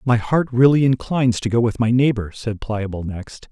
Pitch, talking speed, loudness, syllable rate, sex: 120 Hz, 205 wpm, -19 LUFS, 5.1 syllables/s, male